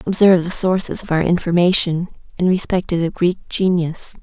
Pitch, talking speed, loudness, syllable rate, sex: 175 Hz, 170 wpm, -17 LUFS, 5.4 syllables/s, female